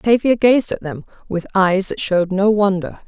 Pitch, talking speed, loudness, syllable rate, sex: 195 Hz, 195 wpm, -17 LUFS, 4.8 syllables/s, female